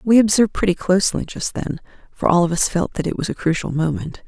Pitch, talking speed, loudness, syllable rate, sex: 185 Hz, 240 wpm, -19 LUFS, 6.1 syllables/s, female